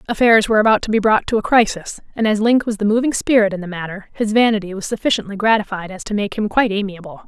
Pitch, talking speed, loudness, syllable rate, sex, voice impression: 210 Hz, 245 wpm, -17 LUFS, 6.8 syllables/s, female, feminine, young, tensed, powerful, slightly bright, clear, fluent, slightly nasal, intellectual, friendly, slightly unique, lively, slightly kind